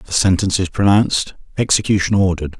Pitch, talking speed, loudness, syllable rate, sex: 95 Hz, 115 wpm, -16 LUFS, 6.4 syllables/s, male